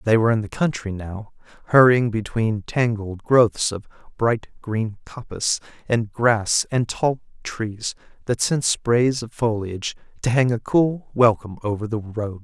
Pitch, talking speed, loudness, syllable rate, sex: 115 Hz, 155 wpm, -21 LUFS, 4.3 syllables/s, male